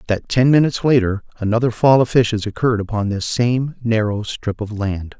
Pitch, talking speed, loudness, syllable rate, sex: 115 Hz, 185 wpm, -18 LUFS, 5.4 syllables/s, male